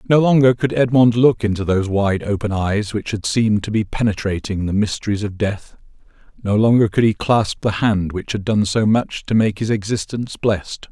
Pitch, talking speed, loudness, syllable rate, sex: 105 Hz, 205 wpm, -18 LUFS, 5.3 syllables/s, male